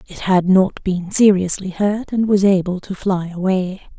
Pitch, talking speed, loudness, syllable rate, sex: 190 Hz, 180 wpm, -17 LUFS, 4.3 syllables/s, female